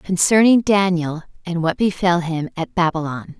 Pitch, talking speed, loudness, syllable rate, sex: 175 Hz, 140 wpm, -18 LUFS, 4.6 syllables/s, female